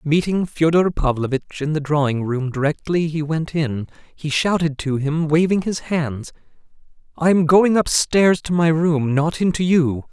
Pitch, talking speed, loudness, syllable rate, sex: 155 Hz, 170 wpm, -19 LUFS, 4.4 syllables/s, male